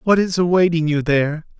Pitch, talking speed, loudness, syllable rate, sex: 165 Hz, 190 wpm, -17 LUFS, 5.8 syllables/s, male